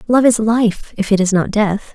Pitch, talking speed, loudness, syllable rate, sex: 215 Hz, 245 wpm, -15 LUFS, 4.6 syllables/s, female